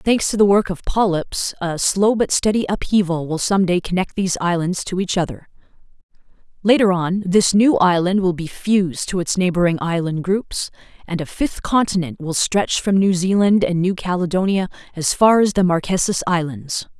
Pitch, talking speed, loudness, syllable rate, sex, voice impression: 185 Hz, 175 wpm, -18 LUFS, 5.1 syllables/s, female, feminine, middle-aged, tensed, powerful, clear, fluent, intellectual, slightly friendly, elegant, lively, strict, sharp